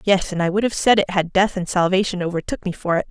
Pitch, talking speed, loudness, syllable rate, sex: 185 Hz, 290 wpm, -20 LUFS, 6.5 syllables/s, female